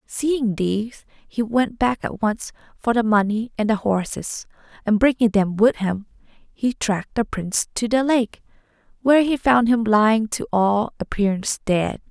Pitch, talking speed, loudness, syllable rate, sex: 225 Hz, 170 wpm, -21 LUFS, 4.5 syllables/s, female